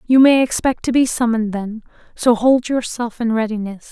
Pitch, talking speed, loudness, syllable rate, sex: 235 Hz, 185 wpm, -17 LUFS, 5.2 syllables/s, female